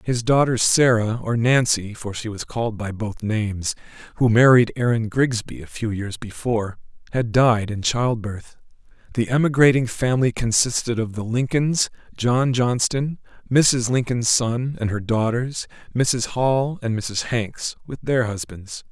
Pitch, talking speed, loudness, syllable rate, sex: 115 Hz, 150 wpm, -21 LUFS, 4.3 syllables/s, male